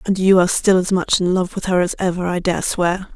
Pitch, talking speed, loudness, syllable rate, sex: 185 Hz, 285 wpm, -17 LUFS, 5.6 syllables/s, female